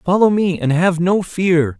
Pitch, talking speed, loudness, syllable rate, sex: 175 Hz, 200 wpm, -16 LUFS, 4.2 syllables/s, male